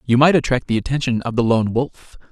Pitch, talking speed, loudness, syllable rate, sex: 125 Hz, 235 wpm, -18 LUFS, 5.9 syllables/s, male